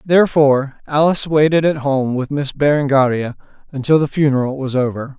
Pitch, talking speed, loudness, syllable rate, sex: 140 Hz, 150 wpm, -16 LUFS, 5.6 syllables/s, male